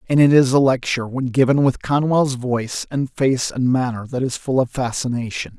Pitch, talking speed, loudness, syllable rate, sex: 130 Hz, 205 wpm, -19 LUFS, 5.2 syllables/s, male